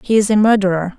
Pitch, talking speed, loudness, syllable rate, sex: 205 Hz, 245 wpm, -14 LUFS, 6.7 syllables/s, female